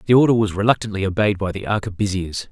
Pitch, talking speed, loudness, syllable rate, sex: 100 Hz, 190 wpm, -20 LUFS, 6.8 syllables/s, male